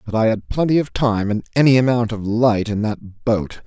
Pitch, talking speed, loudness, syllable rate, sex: 115 Hz, 230 wpm, -18 LUFS, 4.9 syllables/s, male